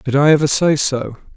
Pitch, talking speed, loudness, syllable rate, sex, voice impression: 145 Hz, 220 wpm, -15 LUFS, 5.2 syllables/s, male, masculine, adult-like, tensed, slightly powerful, slightly dark, slightly raspy, intellectual, sincere, calm, mature, friendly, wild, lively, slightly kind, slightly strict